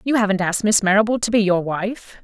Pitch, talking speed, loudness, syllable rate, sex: 205 Hz, 240 wpm, -18 LUFS, 6.2 syllables/s, female